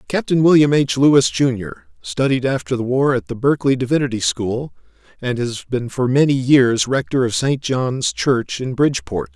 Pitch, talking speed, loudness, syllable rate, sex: 125 Hz, 175 wpm, -17 LUFS, 4.9 syllables/s, male